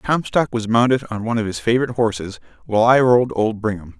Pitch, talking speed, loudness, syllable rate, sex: 115 Hz, 210 wpm, -18 LUFS, 6.3 syllables/s, male